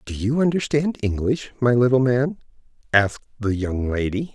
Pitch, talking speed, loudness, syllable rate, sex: 120 Hz, 150 wpm, -21 LUFS, 4.9 syllables/s, male